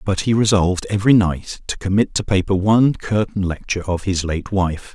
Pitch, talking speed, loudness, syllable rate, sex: 100 Hz, 195 wpm, -18 LUFS, 5.4 syllables/s, male